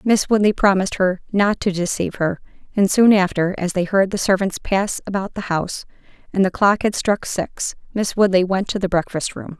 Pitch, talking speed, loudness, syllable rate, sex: 195 Hz, 205 wpm, -19 LUFS, 5.3 syllables/s, female